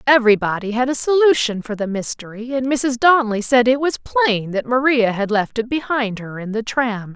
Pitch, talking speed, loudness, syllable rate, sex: 240 Hz, 200 wpm, -18 LUFS, 5.2 syllables/s, female